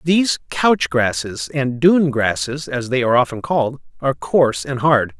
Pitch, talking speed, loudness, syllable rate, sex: 130 Hz, 175 wpm, -18 LUFS, 4.9 syllables/s, male